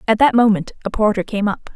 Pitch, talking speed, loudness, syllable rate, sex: 215 Hz, 240 wpm, -17 LUFS, 6.0 syllables/s, female